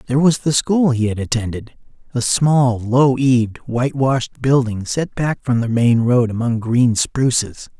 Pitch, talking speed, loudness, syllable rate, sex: 125 Hz, 175 wpm, -17 LUFS, 4.4 syllables/s, male